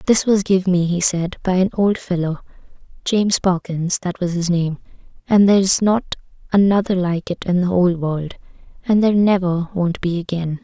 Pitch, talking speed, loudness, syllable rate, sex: 185 Hz, 170 wpm, -18 LUFS, 5.1 syllables/s, female